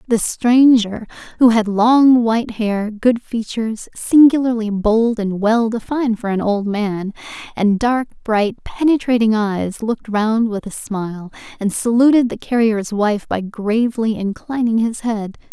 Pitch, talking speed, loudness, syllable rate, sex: 225 Hz, 145 wpm, -17 LUFS, 4.2 syllables/s, female